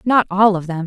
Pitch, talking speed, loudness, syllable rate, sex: 195 Hz, 280 wpm, -16 LUFS, 5.5 syllables/s, female